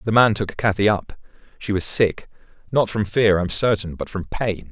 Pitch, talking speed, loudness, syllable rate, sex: 100 Hz, 205 wpm, -20 LUFS, 4.8 syllables/s, male